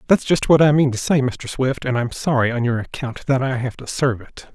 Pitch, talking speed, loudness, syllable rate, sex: 130 Hz, 275 wpm, -19 LUFS, 5.5 syllables/s, male